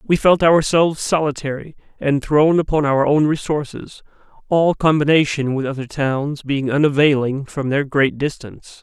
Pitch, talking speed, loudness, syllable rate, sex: 145 Hz, 145 wpm, -17 LUFS, 4.7 syllables/s, male